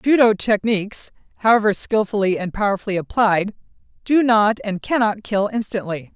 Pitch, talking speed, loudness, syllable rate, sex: 210 Hz, 135 wpm, -19 LUFS, 5.1 syllables/s, female